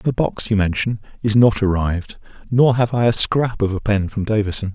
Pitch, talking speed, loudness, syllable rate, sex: 110 Hz, 215 wpm, -18 LUFS, 5.3 syllables/s, male